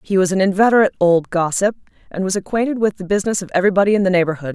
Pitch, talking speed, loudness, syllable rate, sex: 190 Hz, 225 wpm, -17 LUFS, 7.9 syllables/s, female